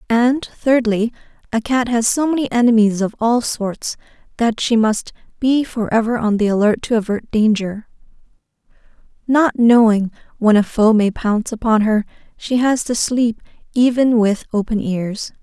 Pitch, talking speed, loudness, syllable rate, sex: 230 Hz, 155 wpm, -17 LUFS, 4.6 syllables/s, female